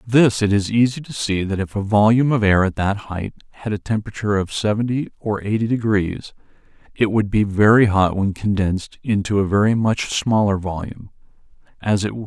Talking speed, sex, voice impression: 255 wpm, male, masculine, middle-aged, relaxed, weak, slightly dark, slightly halting, calm, kind, modest